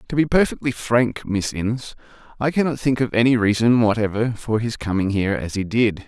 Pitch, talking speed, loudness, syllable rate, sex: 115 Hz, 210 wpm, -20 LUFS, 5.5 syllables/s, male